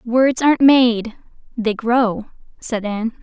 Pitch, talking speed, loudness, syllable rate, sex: 235 Hz, 110 wpm, -17 LUFS, 3.6 syllables/s, female